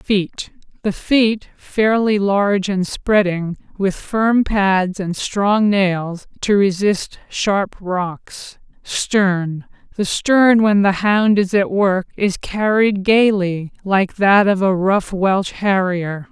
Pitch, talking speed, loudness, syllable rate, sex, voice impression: 195 Hz, 125 wpm, -17 LUFS, 2.9 syllables/s, female, feminine, adult-like, tensed, powerful, hard, slightly muffled, unique, slightly lively, slightly sharp